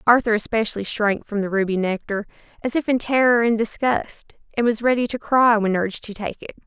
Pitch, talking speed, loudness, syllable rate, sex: 220 Hz, 205 wpm, -21 LUFS, 5.6 syllables/s, female